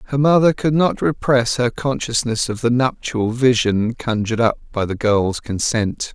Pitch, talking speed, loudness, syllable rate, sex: 120 Hz, 165 wpm, -18 LUFS, 4.5 syllables/s, male